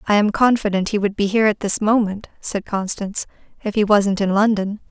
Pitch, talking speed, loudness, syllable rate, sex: 205 Hz, 210 wpm, -19 LUFS, 5.7 syllables/s, female